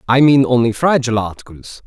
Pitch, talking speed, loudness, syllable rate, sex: 120 Hz, 160 wpm, -14 LUFS, 5.9 syllables/s, male